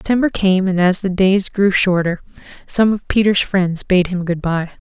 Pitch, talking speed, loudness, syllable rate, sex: 190 Hz, 195 wpm, -16 LUFS, 4.8 syllables/s, female